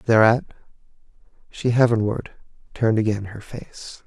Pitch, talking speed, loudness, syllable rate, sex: 110 Hz, 105 wpm, -21 LUFS, 4.4 syllables/s, male